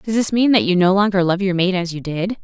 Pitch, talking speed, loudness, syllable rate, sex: 190 Hz, 320 wpm, -17 LUFS, 5.9 syllables/s, female